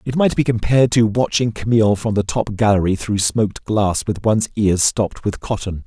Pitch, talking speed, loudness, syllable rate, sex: 105 Hz, 205 wpm, -18 LUFS, 5.5 syllables/s, male